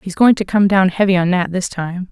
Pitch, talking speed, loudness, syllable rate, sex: 190 Hz, 285 wpm, -15 LUFS, 5.5 syllables/s, female